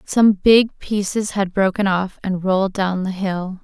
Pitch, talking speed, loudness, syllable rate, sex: 195 Hz, 180 wpm, -18 LUFS, 4.0 syllables/s, female